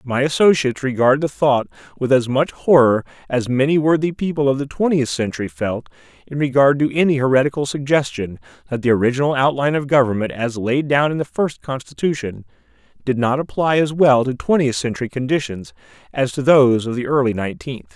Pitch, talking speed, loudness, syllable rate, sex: 135 Hz, 175 wpm, -18 LUFS, 5.8 syllables/s, male